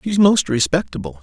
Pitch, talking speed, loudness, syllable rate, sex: 145 Hz, 195 wpm, -17 LUFS, 6.3 syllables/s, male